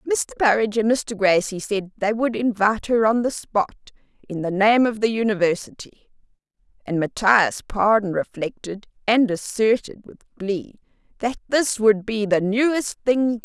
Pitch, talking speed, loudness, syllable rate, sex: 215 Hz, 155 wpm, -21 LUFS, 4.6 syllables/s, female